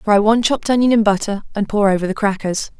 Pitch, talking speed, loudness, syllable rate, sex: 210 Hz, 235 wpm, -17 LUFS, 6.5 syllables/s, female